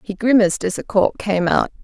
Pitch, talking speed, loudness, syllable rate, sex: 205 Hz, 230 wpm, -18 LUFS, 5.5 syllables/s, female